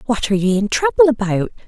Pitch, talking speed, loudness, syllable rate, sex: 230 Hz, 215 wpm, -16 LUFS, 6.5 syllables/s, female